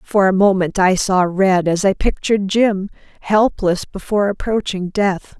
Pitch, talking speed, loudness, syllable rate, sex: 195 Hz, 155 wpm, -17 LUFS, 4.5 syllables/s, female